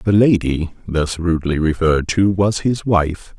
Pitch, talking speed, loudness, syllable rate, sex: 90 Hz, 160 wpm, -17 LUFS, 4.4 syllables/s, male